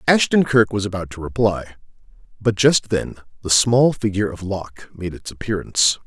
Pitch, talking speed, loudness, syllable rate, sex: 105 Hz, 170 wpm, -19 LUFS, 5.4 syllables/s, male